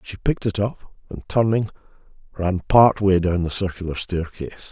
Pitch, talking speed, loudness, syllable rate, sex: 95 Hz, 165 wpm, -21 LUFS, 5.7 syllables/s, male